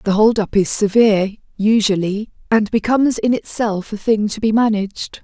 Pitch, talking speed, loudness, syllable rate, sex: 210 Hz, 170 wpm, -17 LUFS, 5.1 syllables/s, female